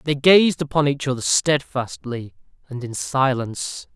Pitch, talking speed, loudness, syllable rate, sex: 130 Hz, 135 wpm, -20 LUFS, 4.4 syllables/s, male